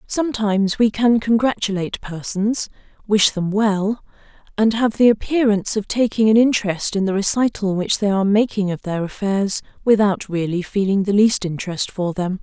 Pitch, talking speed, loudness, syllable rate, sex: 205 Hz, 165 wpm, -19 LUFS, 5.2 syllables/s, female